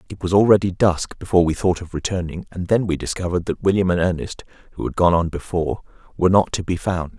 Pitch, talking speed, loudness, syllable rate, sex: 90 Hz, 225 wpm, -20 LUFS, 6.6 syllables/s, male